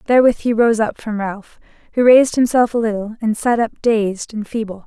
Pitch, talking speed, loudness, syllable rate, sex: 225 Hz, 210 wpm, -17 LUFS, 5.4 syllables/s, female